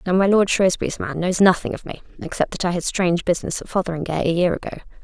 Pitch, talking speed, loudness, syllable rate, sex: 180 Hz, 240 wpm, -20 LUFS, 7.1 syllables/s, female